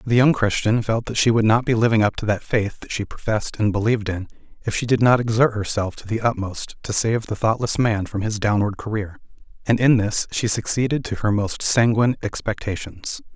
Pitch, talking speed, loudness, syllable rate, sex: 110 Hz, 215 wpm, -21 LUFS, 5.5 syllables/s, male